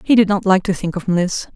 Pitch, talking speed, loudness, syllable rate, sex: 190 Hz, 310 wpm, -17 LUFS, 5.7 syllables/s, female